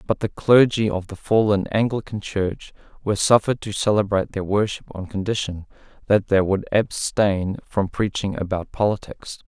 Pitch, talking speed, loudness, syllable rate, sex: 100 Hz, 150 wpm, -21 LUFS, 5.0 syllables/s, male